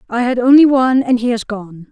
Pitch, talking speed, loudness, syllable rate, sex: 240 Hz, 250 wpm, -13 LUFS, 5.8 syllables/s, female